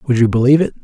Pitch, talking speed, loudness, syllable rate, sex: 130 Hz, 285 wpm, -13 LUFS, 8.3 syllables/s, male